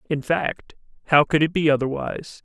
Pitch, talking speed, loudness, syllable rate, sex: 150 Hz, 170 wpm, -21 LUFS, 5.3 syllables/s, male